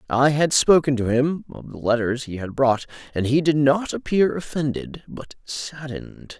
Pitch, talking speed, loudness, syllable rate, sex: 135 Hz, 180 wpm, -21 LUFS, 4.5 syllables/s, male